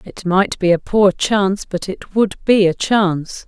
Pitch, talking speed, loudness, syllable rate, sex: 190 Hz, 205 wpm, -16 LUFS, 4.3 syllables/s, female